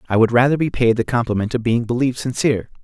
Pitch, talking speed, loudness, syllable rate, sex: 120 Hz, 235 wpm, -18 LUFS, 7.1 syllables/s, male